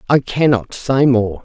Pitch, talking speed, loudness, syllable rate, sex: 125 Hz, 165 wpm, -15 LUFS, 4.0 syllables/s, female